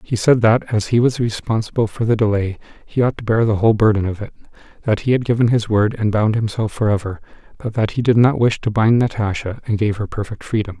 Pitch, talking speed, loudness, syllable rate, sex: 110 Hz, 240 wpm, -18 LUFS, 6.0 syllables/s, male